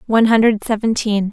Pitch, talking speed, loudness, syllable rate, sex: 220 Hz, 135 wpm, -15 LUFS, 6.1 syllables/s, female